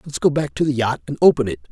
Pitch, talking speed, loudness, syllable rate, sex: 140 Hz, 315 wpm, -19 LUFS, 7.0 syllables/s, male